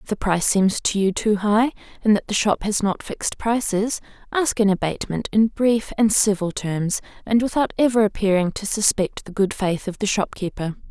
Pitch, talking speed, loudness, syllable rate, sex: 205 Hz, 200 wpm, -21 LUFS, 5.1 syllables/s, female